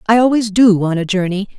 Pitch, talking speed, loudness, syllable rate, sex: 205 Hz, 225 wpm, -14 LUFS, 6.0 syllables/s, female